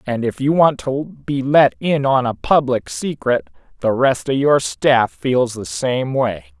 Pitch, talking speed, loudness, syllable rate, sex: 125 Hz, 180 wpm, -17 LUFS, 3.8 syllables/s, male